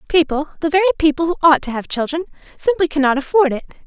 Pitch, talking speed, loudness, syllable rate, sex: 310 Hz, 170 wpm, -17 LUFS, 7.0 syllables/s, female